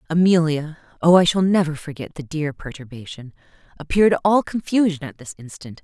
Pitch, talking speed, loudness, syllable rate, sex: 160 Hz, 155 wpm, -19 LUFS, 3.7 syllables/s, female